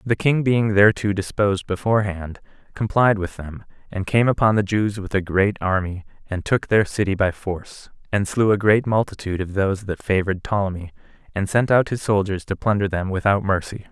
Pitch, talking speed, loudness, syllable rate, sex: 100 Hz, 190 wpm, -21 LUFS, 5.5 syllables/s, male